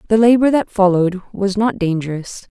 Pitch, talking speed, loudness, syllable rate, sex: 200 Hz, 165 wpm, -16 LUFS, 5.4 syllables/s, female